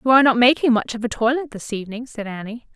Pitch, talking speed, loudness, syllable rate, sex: 235 Hz, 260 wpm, -19 LUFS, 6.9 syllables/s, female